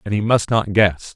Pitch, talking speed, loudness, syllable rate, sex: 105 Hz, 260 wpm, -17 LUFS, 4.8 syllables/s, male